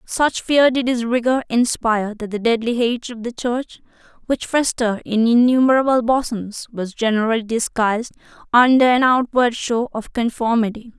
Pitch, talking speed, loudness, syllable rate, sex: 235 Hz, 150 wpm, -18 LUFS, 5.1 syllables/s, female